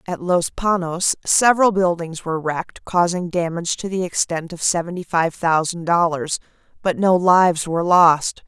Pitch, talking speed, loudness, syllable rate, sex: 175 Hz, 155 wpm, -19 LUFS, 4.9 syllables/s, female